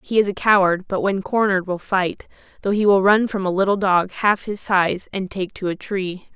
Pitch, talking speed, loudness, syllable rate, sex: 195 Hz, 235 wpm, -20 LUFS, 5.0 syllables/s, female